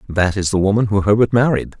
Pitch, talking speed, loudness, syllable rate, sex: 105 Hz, 235 wpm, -16 LUFS, 6.3 syllables/s, male